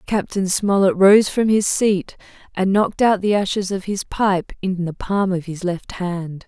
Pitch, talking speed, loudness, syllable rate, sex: 190 Hz, 195 wpm, -19 LUFS, 4.3 syllables/s, female